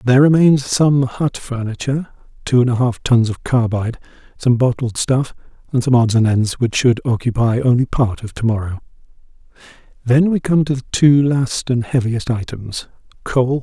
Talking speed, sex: 180 wpm, male